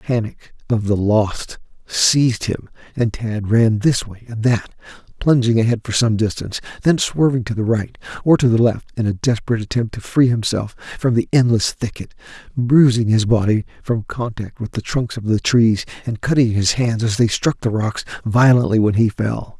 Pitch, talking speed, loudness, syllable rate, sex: 115 Hz, 195 wpm, -18 LUFS, 5.1 syllables/s, male